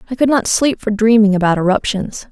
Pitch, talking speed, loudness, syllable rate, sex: 215 Hz, 205 wpm, -14 LUFS, 5.7 syllables/s, female